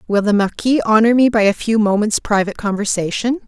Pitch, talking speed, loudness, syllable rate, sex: 215 Hz, 190 wpm, -16 LUFS, 5.9 syllables/s, female